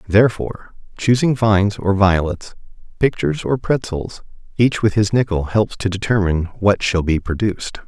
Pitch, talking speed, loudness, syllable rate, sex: 100 Hz, 145 wpm, -18 LUFS, 5.1 syllables/s, male